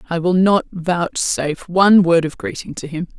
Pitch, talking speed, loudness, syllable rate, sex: 180 Hz, 190 wpm, -17 LUFS, 4.9 syllables/s, female